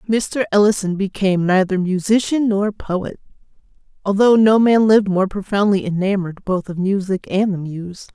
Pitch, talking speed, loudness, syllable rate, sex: 195 Hz, 145 wpm, -17 LUFS, 5.0 syllables/s, female